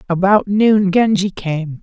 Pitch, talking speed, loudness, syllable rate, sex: 190 Hz, 130 wpm, -15 LUFS, 3.6 syllables/s, female